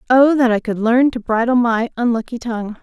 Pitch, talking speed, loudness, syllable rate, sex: 235 Hz, 210 wpm, -16 LUFS, 5.5 syllables/s, female